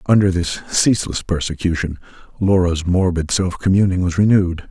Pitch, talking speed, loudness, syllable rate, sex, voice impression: 90 Hz, 125 wpm, -18 LUFS, 5.4 syllables/s, male, very masculine, middle-aged, thick, muffled, cool, slightly calm, wild